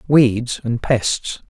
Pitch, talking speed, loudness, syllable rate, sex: 120 Hz, 120 wpm, -18 LUFS, 2.4 syllables/s, male